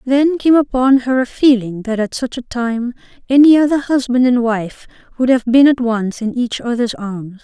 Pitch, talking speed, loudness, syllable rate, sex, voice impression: 245 Hz, 200 wpm, -15 LUFS, 4.7 syllables/s, female, very feminine, very young, slightly adult-like, very thin, slightly relaxed, slightly weak, bright, slightly clear, fluent, cute, slightly intellectual, slightly calm, slightly reassuring, unique, slightly elegant, slightly sweet, kind, modest